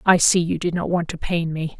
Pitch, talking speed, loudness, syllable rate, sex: 170 Hz, 300 wpm, -21 LUFS, 5.3 syllables/s, female